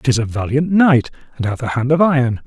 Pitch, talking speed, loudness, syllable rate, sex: 135 Hz, 245 wpm, -16 LUFS, 5.6 syllables/s, male